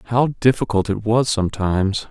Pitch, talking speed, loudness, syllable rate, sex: 110 Hz, 145 wpm, -19 LUFS, 4.8 syllables/s, male